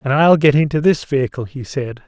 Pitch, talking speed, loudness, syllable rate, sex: 140 Hz, 230 wpm, -16 LUFS, 5.7 syllables/s, male